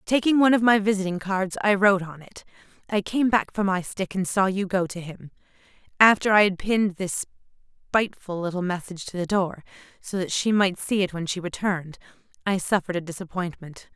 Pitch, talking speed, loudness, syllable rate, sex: 190 Hz, 200 wpm, -23 LUFS, 5.9 syllables/s, female